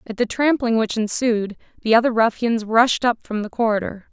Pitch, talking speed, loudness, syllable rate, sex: 225 Hz, 190 wpm, -19 LUFS, 5.2 syllables/s, female